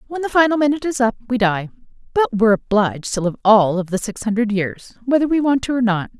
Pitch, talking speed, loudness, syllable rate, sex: 235 Hz, 240 wpm, -18 LUFS, 6.4 syllables/s, female